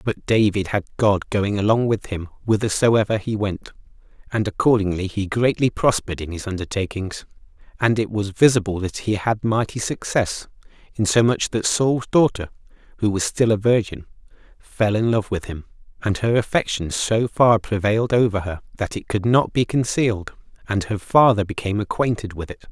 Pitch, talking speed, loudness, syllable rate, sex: 105 Hz, 165 wpm, -21 LUFS, 5.1 syllables/s, male